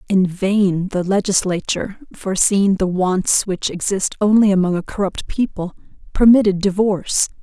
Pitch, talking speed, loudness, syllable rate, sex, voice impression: 195 Hz, 130 wpm, -17 LUFS, 4.7 syllables/s, female, feminine, tensed, powerful, soft, raspy, intellectual, calm, friendly, reassuring, elegant, kind, slightly modest